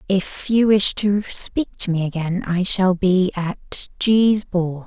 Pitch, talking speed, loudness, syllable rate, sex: 190 Hz, 175 wpm, -19 LUFS, 3.3 syllables/s, female